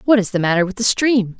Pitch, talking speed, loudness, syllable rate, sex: 215 Hz, 300 wpm, -17 LUFS, 6.3 syllables/s, female